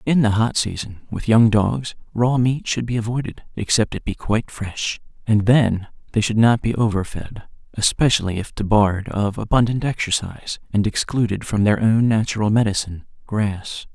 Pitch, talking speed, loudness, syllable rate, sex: 110 Hz, 170 wpm, -20 LUFS, 5.0 syllables/s, male